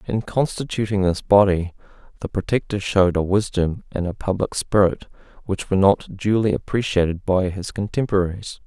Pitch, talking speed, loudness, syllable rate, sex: 100 Hz, 145 wpm, -21 LUFS, 5.3 syllables/s, male